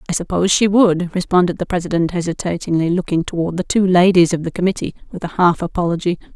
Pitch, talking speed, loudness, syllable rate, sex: 175 Hz, 190 wpm, -17 LUFS, 6.5 syllables/s, female